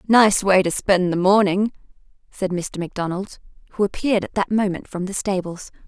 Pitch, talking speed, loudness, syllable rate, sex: 190 Hz, 175 wpm, -20 LUFS, 5.4 syllables/s, female